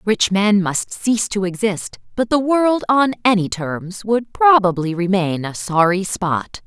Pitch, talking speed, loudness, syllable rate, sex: 200 Hz, 160 wpm, -18 LUFS, 4.0 syllables/s, female